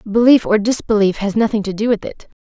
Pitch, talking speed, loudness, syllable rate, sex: 215 Hz, 225 wpm, -16 LUFS, 5.9 syllables/s, female